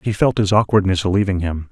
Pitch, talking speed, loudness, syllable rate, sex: 95 Hz, 210 wpm, -17 LUFS, 5.6 syllables/s, male